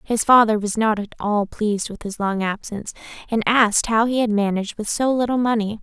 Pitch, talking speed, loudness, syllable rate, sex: 220 Hz, 215 wpm, -20 LUFS, 5.7 syllables/s, female